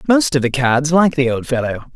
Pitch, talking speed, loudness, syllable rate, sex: 140 Hz, 245 wpm, -16 LUFS, 5.4 syllables/s, male